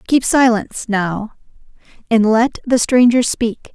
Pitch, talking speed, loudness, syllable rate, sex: 230 Hz, 130 wpm, -15 LUFS, 3.9 syllables/s, female